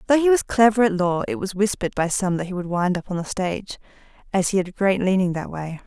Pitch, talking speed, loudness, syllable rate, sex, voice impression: 190 Hz, 275 wpm, -22 LUFS, 6.5 syllables/s, female, very feminine, adult-like, slightly middle-aged, thin, slightly relaxed, slightly weak, slightly bright, soft, clear, slightly fluent, slightly raspy, slightly cute, intellectual, very refreshing, sincere, calm, slightly friendly, very reassuring, slightly unique, elegant, slightly sweet, slightly lively, kind, slightly sharp, modest